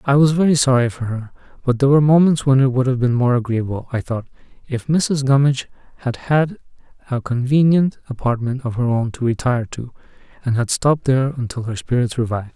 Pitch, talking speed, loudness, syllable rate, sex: 130 Hz, 195 wpm, -18 LUFS, 6.0 syllables/s, male